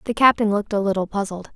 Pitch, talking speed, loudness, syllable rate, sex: 205 Hz, 230 wpm, -20 LUFS, 7.1 syllables/s, female